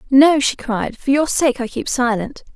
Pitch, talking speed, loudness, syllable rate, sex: 260 Hz, 210 wpm, -17 LUFS, 4.4 syllables/s, female